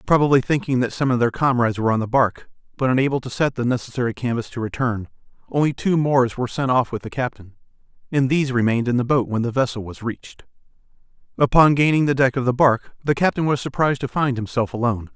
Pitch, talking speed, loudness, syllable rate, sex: 125 Hz, 220 wpm, -20 LUFS, 6.8 syllables/s, male